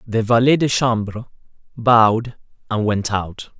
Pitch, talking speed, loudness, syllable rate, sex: 115 Hz, 135 wpm, -18 LUFS, 4.2 syllables/s, male